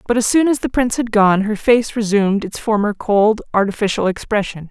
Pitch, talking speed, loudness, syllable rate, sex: 215 Hz, 205 wpm, -16 LUFS, 5.6 syllables/s, female